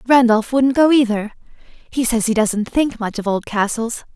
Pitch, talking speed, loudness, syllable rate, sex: 235 Hz, 190 wpm, -17 LUFS, 4.5 syllables/s, female